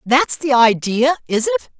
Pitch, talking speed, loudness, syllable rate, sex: 265 Hz, 170 wpm, -16 LUFS, 4.6 syllables/s, female